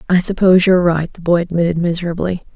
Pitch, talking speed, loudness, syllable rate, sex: 175 Hz, 190 wpm, -15 LUFS, 6.9 syllables/s, female